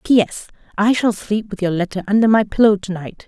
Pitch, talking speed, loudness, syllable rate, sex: 205 Hz, 220 wpm, -17 LUFS, 5.7 syllables/s, female